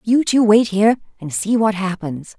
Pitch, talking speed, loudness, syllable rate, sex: 210 Hz, 200 wpm, -17 LUFS, 4.9 syllables/s, female